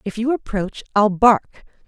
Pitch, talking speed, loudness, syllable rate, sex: 215 Hz, 160 wpm, -18 LUFS, 4.8 syllables/s, female